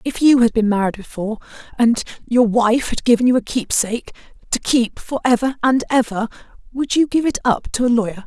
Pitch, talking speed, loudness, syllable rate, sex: 235 Hz, 195 wpm, -18 LUFS, 5.7 syllables/s, female